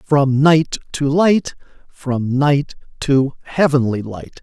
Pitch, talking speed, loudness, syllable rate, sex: 140 Hz, 120 wpm, -17 LUFS, 3.2 syllables/s, male